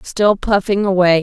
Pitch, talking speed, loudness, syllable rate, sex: 195 Hz, 145 wpm, -15 LUFS, 4.2 syllables/s, female